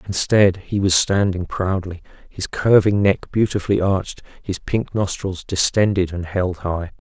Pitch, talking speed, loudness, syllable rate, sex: 95 Hz, 145 wpm, -19 LUFS, 4.4 syllables/s, male